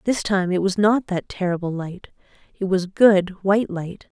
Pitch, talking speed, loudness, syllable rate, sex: 190 Hz, 185 wpm, -21 LUFS, 4.5 syllables/s, female